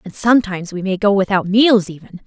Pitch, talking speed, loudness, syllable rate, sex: 200 Hz, 210 wpm, -15 LUFS, 6.1 syllables/s, female